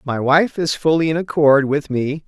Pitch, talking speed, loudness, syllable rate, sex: 150 Hz, 210 wpm, -17 LUFS, 4.6 syllables/s, male